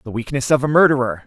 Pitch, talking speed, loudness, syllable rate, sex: 135 Hz, 235 wpm, -17 LUFS, 6.8 syllables/s, male